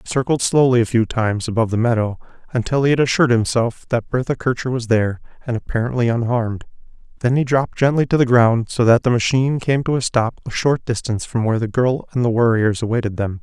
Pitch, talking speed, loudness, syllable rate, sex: 120 Hz, 220 wpm, -18 LUFS, 6.4 syllables/s, male